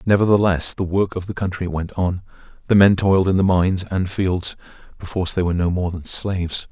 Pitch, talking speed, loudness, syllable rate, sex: 90 Hz, 195 wpm, -19 LUFS, 5.8 syllables/s, male